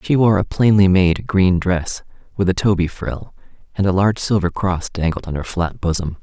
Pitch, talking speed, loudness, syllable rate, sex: 95 Hz, 200 wpm, -18 LUFS, 5.0 syllables/s, male